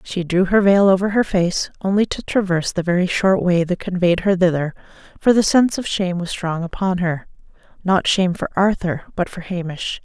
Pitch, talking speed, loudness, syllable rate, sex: 185 Hz, 205 wpm, -18 LUFS, 5.4 syllables/s, female